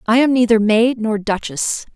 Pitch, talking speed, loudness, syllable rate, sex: 225 Hz, 185 wpm, -16 LUFS, 4.6 syllables/s, female